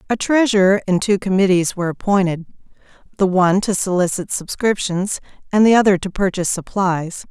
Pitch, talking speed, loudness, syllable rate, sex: 190 Hz, 150 wpm, -17 LUFS, 5.6 syllables/s, female